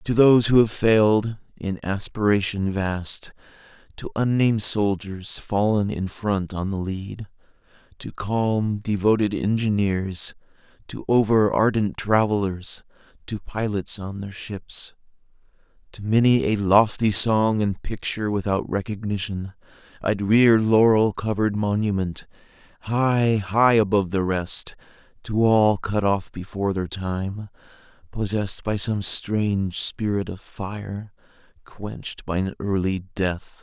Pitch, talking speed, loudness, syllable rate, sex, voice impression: 100 Hz, 110 wpm, -23 LUFS, 3.8 syllables/s, male, masculine, adult-like, relaxed, weak, dark, halting, calm, slightly reassuring, wild, kind, modest